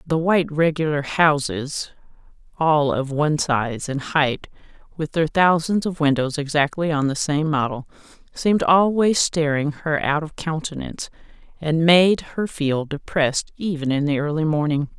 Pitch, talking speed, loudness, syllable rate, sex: 155 Hz, 150 wpm, -20 LUFS, 4.6 syllables/s, female